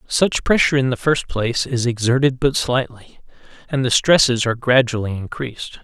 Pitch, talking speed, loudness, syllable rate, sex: 125 Hz, 165 wpm, -18 LUFS, 5.4 syllables/s, male